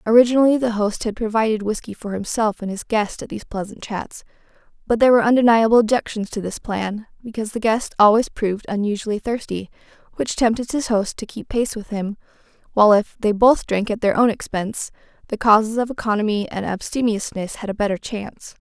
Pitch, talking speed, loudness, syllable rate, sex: 220 Hz, 185 wpm, -20 LUFS, 6.0 syllables/s, female